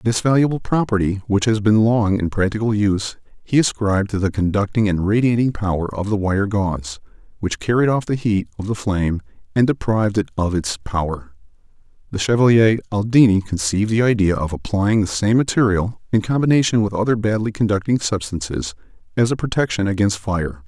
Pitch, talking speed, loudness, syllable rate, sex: 105 Hz, 170 wpm, -19 LUFS, 5.7 syllables/s, male